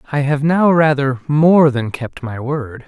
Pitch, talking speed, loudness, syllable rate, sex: 140 Hz, 190 wpm, -15 LUFS, 3.9 syllables/s, male